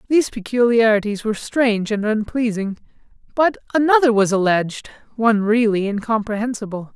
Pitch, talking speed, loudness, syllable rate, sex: 225 Hz, 110 wpm, -18 LUFS, 5.8 syllables/s, male